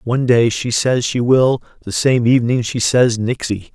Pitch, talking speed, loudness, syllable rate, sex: 120 Hz, 190 wpm, -16 LUFS, 4.7 syllables/s, male